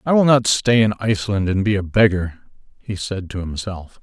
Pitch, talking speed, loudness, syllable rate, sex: 100 Hz, 210 wpm, -18 LUFS, 5.2 syllables/s, male